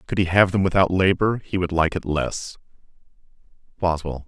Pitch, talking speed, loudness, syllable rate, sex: 90 Hz, 170 wpm, -21 LUFS, 5.2 syllables/s, male